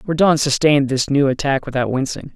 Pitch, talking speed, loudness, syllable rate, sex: 140 Hz, 180 wpm, -17 LUFS, 5.9 syllables/s, male